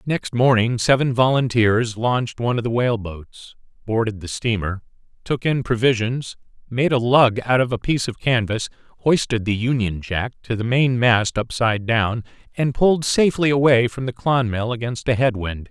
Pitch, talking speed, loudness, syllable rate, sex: 120 Hz, 170 wpm, -20 LUFS, 5.0 syllables/s, male